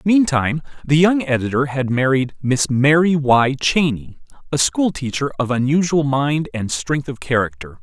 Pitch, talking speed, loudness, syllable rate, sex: 140 Hz, 145 wpm, -18 LUFS, 4.6 syllables/s, male